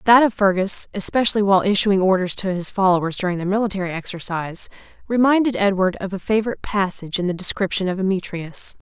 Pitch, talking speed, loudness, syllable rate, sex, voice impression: 195 Hz, 170 wpm, -19 LUFS, 6.5 syllables/s, female, very feminine, slightly young, slightly adult-like, thin, tensed, very powerful, bright, hard, clear, very fluent, slightly raspy, cool, very intellectual, refreshing, very sincere, slightly calm, friendly, very reassuring, slightly unique, elegant, slightly wild, slightly sweet, lively, strict, intense, slightly sharp